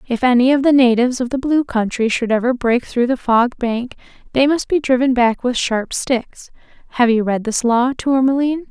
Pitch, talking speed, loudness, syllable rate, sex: 250 Hz, 205 wpm, -16 LUFS, 5.1 syllables/s, female